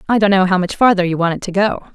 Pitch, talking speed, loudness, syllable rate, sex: 190 Hz, 340 wpm, -15 LUFS, 7.2 syllables/s, female